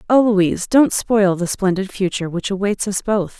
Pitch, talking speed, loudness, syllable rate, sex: 200 Hz, 195 wpm, -18 LUFS, 5.1 syllables/s, female